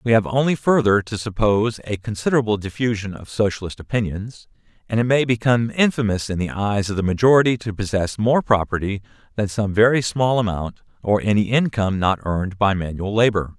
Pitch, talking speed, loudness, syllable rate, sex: 110 Hz, 175 wpm, -20 LUFS, 5.8 syllables/s, male